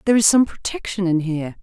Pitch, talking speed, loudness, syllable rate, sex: 195 Hz, 220 wpm, -19 LUFS, 6.8 syllables/s, female